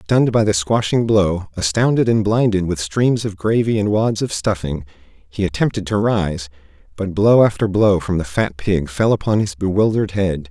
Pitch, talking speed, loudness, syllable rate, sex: 100 Hz, 190 wpm, -18 LUFS, 4.8 syllables/s, male